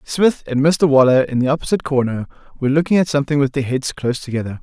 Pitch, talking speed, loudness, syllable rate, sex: 140 Hz, 235 wpm, -17 LUFS, 8.3 syllables/s, male